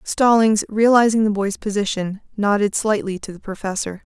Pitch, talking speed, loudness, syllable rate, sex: 210 Hz, 145 wpm, -19 LUFS, 5.0 syllables/s, female